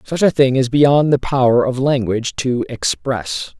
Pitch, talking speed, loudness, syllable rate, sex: 125 Hz, 185 wpm, -16 LUFS, 4.4 syllables/s, male